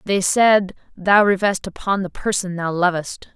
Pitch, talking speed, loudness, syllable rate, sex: 190 Hz, 160 wpm, -18 LUFS, 4.3 syllables/s, female